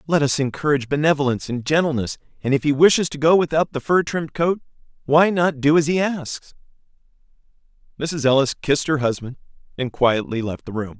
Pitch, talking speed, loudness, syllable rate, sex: 145 Hz, 180 wpm, -20 LUFS, 5.9 syllables/s, male